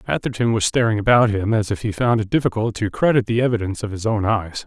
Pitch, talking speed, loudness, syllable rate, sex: 110 Hz, 245 wpm, -19 LUFS, 6.4 syllables/s, male